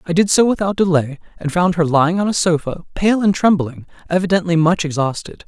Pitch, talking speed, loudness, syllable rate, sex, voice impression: 175 Hz, 195 wpm, -16 LUFS, 5.7 syllables/s, male, masculine, adult-like, slightly fluent, refreshing, sincere, slightly lively